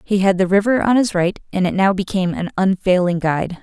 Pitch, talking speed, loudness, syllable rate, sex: 190 Hz, 230 wpm, -17 LUFS, 6.0 syllables/s, female